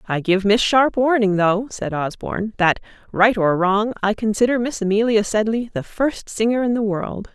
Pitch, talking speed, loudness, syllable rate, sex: 215 Hz, 190 wpm, -19 LUFS, 4.8 syllables/s, female